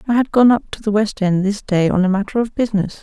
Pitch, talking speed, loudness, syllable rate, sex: 210 Hz, 300 wpm, -17 LUFS, 6.3 syllables/s, female